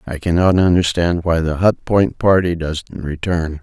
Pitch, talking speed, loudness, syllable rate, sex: 85 Hz, 165 wpm, -17 LUFS, 4.3 syllables/s, male